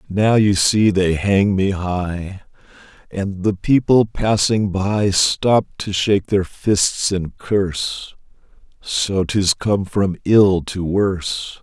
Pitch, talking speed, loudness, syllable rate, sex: 95 Hz, 135 wpm, -18 LUFS, 3.1 syllables/s, male